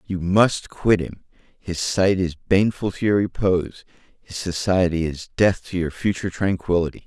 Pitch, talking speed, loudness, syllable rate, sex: 90 Hz, 155 wpm, -21 LUFS, 4.9 syllables/s, male